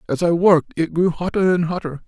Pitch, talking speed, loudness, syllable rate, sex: 170 Hz, 230 wpm, -18 LUFS, 6.0 syllables/s, male